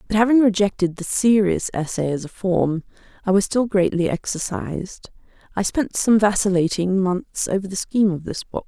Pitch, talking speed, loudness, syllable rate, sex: 195 Hz, 175 wpm, -20 LUFS, 5.1 syllables/s, female